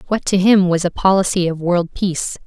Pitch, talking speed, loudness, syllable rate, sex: 185 Hz, 220 wpm, -16 LUFS, 5.5 syllables/s, female